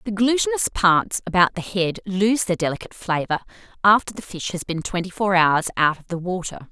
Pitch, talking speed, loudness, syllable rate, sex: 190 Hz, 195 wpm, -21 LUFS, 5.5 syllables/s, female